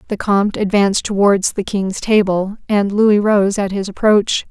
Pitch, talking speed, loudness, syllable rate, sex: 200 Hz, 175 wpm, -15 LUFS, 4.5 syllables/s, female